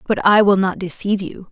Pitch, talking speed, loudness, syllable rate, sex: 195 Hz, 235 wpm, -17 LUFS, 5.9 syllables/s, female